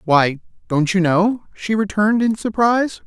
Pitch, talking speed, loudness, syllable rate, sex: 195 Hz, 155 wpm, -18 LUFS, 4.6 syllables/s, male